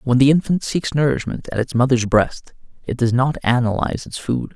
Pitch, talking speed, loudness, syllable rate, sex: 130 Hz, 200 wpm, -19 LUFS, 5.3 syllables/s, male